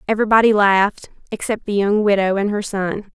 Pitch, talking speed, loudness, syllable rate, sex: 205 Hz, 170 wpm, -17 LUFS, 5.8 syllables/s, female